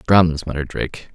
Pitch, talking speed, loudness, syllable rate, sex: 80 Hz, 155 wpm, -20 LUFS, 6.1 syllables/s, male